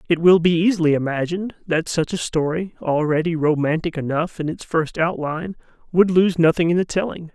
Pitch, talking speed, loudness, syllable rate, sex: 165 Hz, 180 wpm, -20 LUFS, 5.6 syllables/s, male